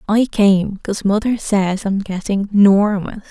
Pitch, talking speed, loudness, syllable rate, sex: 200 Hz, 145 wpm, -16 LUFS, 4.0 syllables/s, female